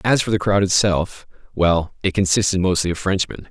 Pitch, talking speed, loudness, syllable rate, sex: 95 Hz, 170 wpm, -19 LUFS, 5.3 syllables/s, male